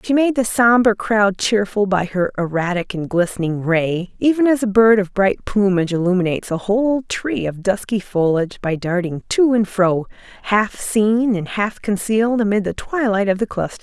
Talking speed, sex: 185 wpm, female